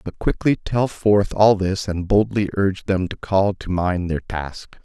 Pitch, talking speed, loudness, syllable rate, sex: 95 Hz, 200 wpm, -20 LUFS, 4.2 syllables/s, male